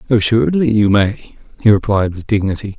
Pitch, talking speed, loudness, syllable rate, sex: 105 Hz, 150 wpm, -15 LUFS, 5.5 syllables/s, male